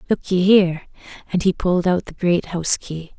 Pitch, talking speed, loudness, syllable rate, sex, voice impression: 175 Hz, 205 wpm, -19 LUFS, 5.6 syllables/s, female, very feminine, slightly young, slightly adult-like, very thin, relaxed, weak, dark, very soft, slightly muffled, fluent, very cute, very intellectual, slightly refreshing, sincere, very calm, very friendly, very reassuring, very unique, very elegant, slightly wild, very sweet, very kind, very modest, very light